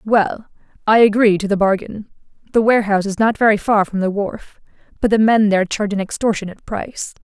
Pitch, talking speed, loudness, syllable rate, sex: 205 Hz, 190 wpm, -17 LUFS, 6.2 syllables/s, female